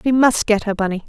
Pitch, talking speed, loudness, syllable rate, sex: 220 Hz, 280 wpm, -17 LUFS, 6.2 syllables/s, female